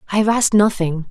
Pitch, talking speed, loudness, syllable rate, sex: 200 Hz, 220 wpm, -16 LUFS, 7.1 syllables/s, female